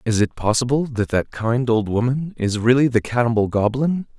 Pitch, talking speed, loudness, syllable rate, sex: 120 Hz, 185 wpm, -20 LUFS, 5.1 syllables/s, male